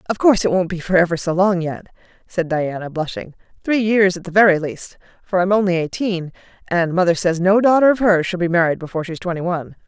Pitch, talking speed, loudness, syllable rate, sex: 180 Hz, 225 wpm, -18 LUFS, 6.1 syllables/s, female